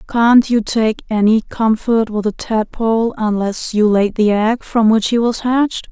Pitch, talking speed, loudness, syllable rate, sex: 220 Hz, 185 wpm, -15 LUFS, 4.2 syllables/s, female